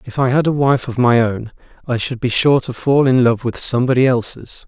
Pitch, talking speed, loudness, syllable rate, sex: 125 Hz, 245 wpm, -15 LUFS, 5.5 syllables/s, male